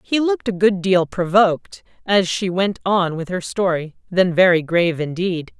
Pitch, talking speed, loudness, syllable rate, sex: 185 Hz, 180 wpm, -18 LUFS, 4.7 syllables/s, female